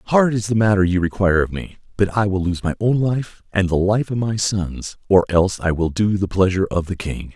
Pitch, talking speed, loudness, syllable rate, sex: 100 Hz, 255 wpm, -19 LUFS, 5.5 syllables/s, male